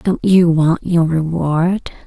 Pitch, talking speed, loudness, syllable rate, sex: 170 Hz, 145 wpm, -15 LUFS, 3.1 syllables/s, female